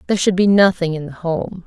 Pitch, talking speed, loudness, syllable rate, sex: 180 Hz, 255 wpm, -17 LUFS, 6.0 syllables/s, female